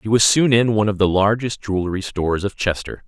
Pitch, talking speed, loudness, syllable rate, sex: 105 Hz, 235 wpm, -18 LUFS, 5.9 syllables/s, male